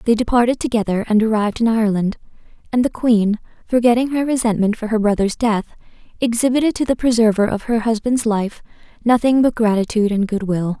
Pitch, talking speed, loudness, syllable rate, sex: 225 Hz, 170 wpm, -17 LUFS, 6.0 syllables/s, female